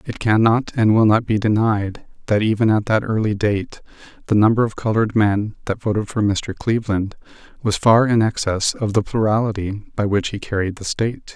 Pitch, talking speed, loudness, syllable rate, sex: 105 Hz, 190 wpm, -19 LUFS, 5.3 syllables/s, male